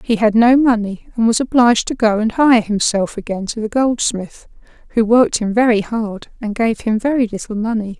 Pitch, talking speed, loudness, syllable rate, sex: 225 Hz, 205 wpm, -16 LUFS, 5.2 syllables/s, female